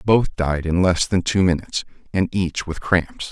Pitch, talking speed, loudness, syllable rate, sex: 90 Hz, 200 wpm, -20 LUFS, 4.5 syllables/s, male